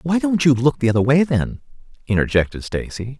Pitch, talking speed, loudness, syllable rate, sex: 135 Hz, 190 wpm, -19 LUFS, 5.7 syllables/s, male